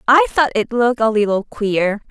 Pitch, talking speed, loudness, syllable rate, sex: 230 Hz, 200 wpm, -16 LUFS, 5.0 syllables/s, female